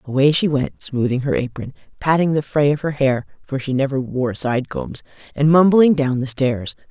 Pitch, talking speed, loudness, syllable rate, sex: 135 Hz, 185 wpm, -19 LUFS, 4.9 syllables/s, female